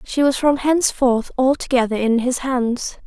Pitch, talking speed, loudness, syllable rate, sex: 255 Hz, 155 wpm, -18 LUFS, 4.6 syllables/s, female